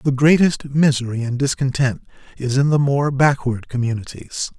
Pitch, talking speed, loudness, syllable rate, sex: 135 Hz, 145 wpm, -18 LUFS, 4.7 syllables/s, male